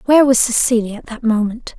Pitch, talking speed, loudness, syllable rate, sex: 235 Hz, 200 wpm, -15 LUFS, 6.1 syllables/s, female